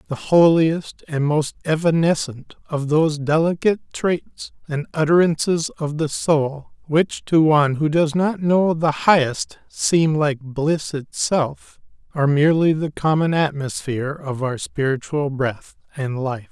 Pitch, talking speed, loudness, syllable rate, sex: 150 Hz, 140 wpm, -20 LUFS, 4.1 syllables/s, male